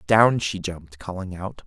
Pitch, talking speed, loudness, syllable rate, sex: 95 Hz, 180 wpm, -24 LUFS, 4.6 syllables/s, male